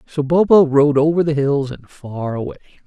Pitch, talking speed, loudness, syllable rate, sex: 145 Hz, 190 wpm, -16 LUFS, 5.1 syllables/s, male